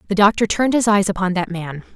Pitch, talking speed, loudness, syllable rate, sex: 195 Hz, 245 wpm, -18 LUFS, 6.6 syllables/s, female